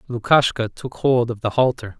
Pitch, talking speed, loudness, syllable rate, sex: 120 Hz, 180 wpm, -19 LUFS, 4.9 syllables/s, male